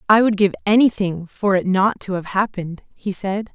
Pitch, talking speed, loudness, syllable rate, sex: 195 Hz, 205 wpm, -19 LUFS, 5.1 syllables/s, female